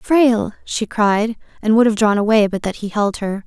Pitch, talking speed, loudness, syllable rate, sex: 215 Hz, 225 wpm, -17 LUFS, 4.9 syllables/s, female